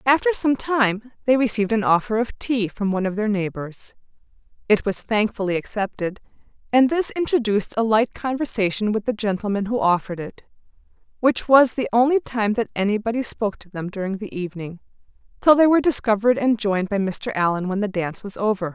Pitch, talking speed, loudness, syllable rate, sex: 215 Hz, 180 wpm, -21 LUFS, 5.9 syllables/s, female